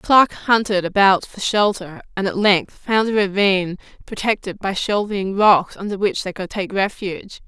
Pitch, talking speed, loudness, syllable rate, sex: 195 Hz, 170 wpm, -19 LUFS, 4.6 syllables/s, female